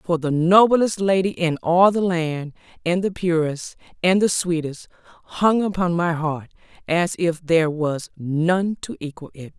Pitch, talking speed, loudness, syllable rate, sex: 170 Hz, 155 wpm, -20 LUFS, 4.2 syllables/s, female